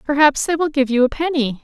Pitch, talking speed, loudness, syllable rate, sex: 285 Hz, 255 wpm, -17 LUFS, 5.9 syllables/s, female